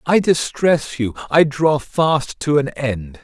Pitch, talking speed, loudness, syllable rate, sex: 145 Hz, 165 wpm, -18 LUFS, 3.4 syllables/s, male